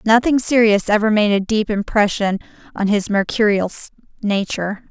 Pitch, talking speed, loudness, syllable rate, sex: 210 Hz, 135 wpm, -17 LUFS, 5.2 syllables/s, female